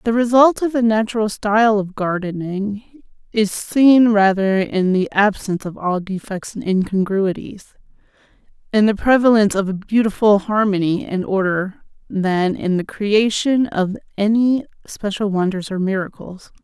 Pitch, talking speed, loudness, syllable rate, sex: 205 Hz, 135 wpm, -18 LUFS, 4.5 syllables/s, female